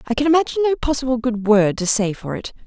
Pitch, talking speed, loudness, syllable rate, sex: 255 Hz, 250 wpm, -18 LUFS, 6.8 syllables/s, female